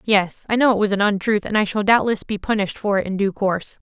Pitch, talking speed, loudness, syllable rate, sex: 205 Hz, 280 wpm, -20 LUFS, 6.3 syllables/s, female